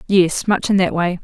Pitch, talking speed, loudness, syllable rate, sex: 185 Hz, 245 wpm, -17 LUFS, 4.8 syllables/s, female